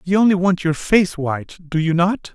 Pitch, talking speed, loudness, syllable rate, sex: 175 Hz, 230 wpm, -18 LUFS, 5.0 syllables/s, male